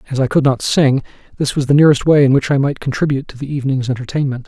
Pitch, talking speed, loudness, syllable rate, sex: 135 Hz, 255 wpm, -15 LUFS, 7.3 syllables/s, male